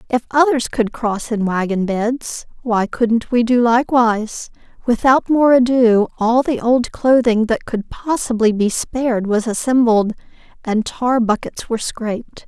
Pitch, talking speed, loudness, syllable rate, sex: 235 Hz, 150 wpm, -17 LUFS, 4.2 syllables/s, female